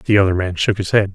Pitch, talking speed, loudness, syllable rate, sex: 95 Hz, 315 wpm, -17 LUFS, 6.3 syllables/s, male